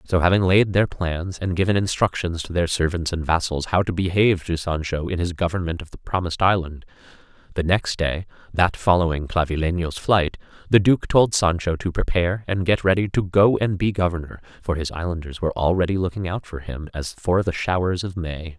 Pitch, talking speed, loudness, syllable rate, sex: 90 Hz, 195 wpm, -22 LUFS, 5.5 syllables/s, male